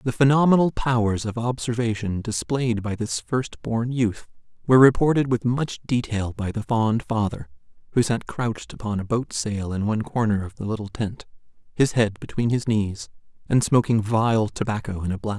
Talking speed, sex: 185 wpm, male